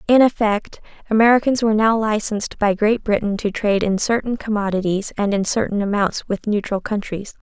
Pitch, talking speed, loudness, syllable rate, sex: 210 Hz, 170 wpm, -19 LUFS, 5.5 syllables/s, female